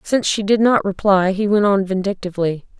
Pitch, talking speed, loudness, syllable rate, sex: 200 Hz, 195 wpm, -17 LUFS, 5.8 syllables/s, female